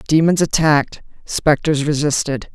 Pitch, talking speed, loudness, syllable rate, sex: 150 Hz, 95 wpm, -17 LUFS, 4.6 syllables/s, female